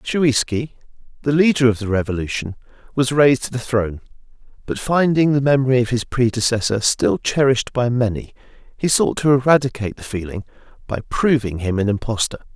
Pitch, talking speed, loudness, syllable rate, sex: 125 Hz, 160 wpm, -18 LUFS, 5.8 syllables/s, male